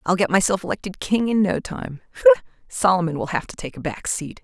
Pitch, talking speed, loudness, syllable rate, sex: 180 Hz, 215 wpm, -21 LUFS, 6.3 syllables/s, female